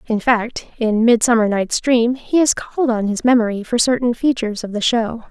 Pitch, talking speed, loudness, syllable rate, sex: 230 Hz, 205 wpm, -17 LUFS, 5.2 syllables/s, female